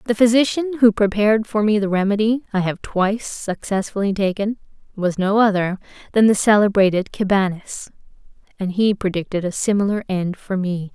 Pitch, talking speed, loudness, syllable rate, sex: 205 Hz, 155 wpm, -19 LUFS, 5.3 syllables/s, female